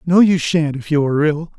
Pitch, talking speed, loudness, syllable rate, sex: 155 Hz, 265 wpm, -16 LUFS, 5.6 syllables/s, male